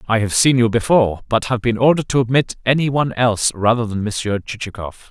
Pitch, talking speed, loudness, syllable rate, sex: 115 Hz, 210 wpm, -17 LUFS, 6.4 syllables/s, male